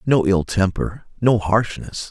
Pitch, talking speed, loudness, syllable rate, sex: 105 Hz, 140 wpm, -20 LUFS, 3.8 syllables/s, male